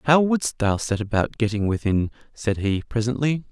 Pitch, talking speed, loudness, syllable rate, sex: 115 Hz, 170 wpm, -23 LUFS, 4.9 syllables/s, male